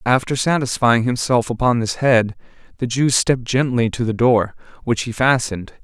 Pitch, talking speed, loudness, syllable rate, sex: 120 Hz, 165 wpm, -18 LUFS, 5.0 syllables/s, male